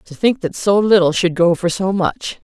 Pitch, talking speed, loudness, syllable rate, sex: 185 Hz, 240 wpm, -16 LUFS, 4.7 syllables/s, female